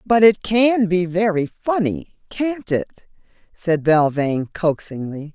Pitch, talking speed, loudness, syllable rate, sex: 185 Hz, 125 wpm, -19 LUFS, 4.1 syllables/s, female